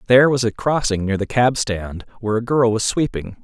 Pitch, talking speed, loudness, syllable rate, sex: 115 Hz, 225 wpm, -19 LUFS, 5.6 syllables/s, male